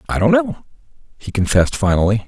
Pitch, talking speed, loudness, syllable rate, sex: 120 Hz, 160 wpm, -17 LUFS, 6.4 syllables/s, male